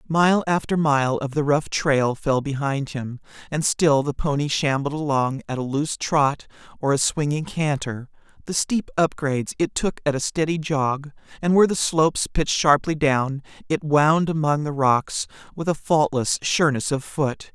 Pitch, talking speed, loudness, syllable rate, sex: 145 Hz, 175 wpm, -22 LUFS, 4.6 syllables/s, male